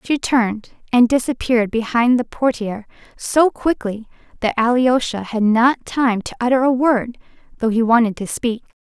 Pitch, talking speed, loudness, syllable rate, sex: 240 Hz, 155 wpm, -18 LUFS, 4.8 syllables/s, female